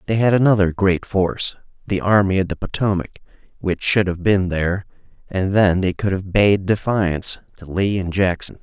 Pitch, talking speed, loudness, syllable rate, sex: 95 Hz, 180 wpm, -19 LUFS, 5.1 syllables/s, male